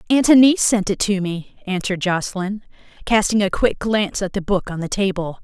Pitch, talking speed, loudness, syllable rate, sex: 200 Hz, 200 wpm, -19 LUFS, 5.8 syllables/s, female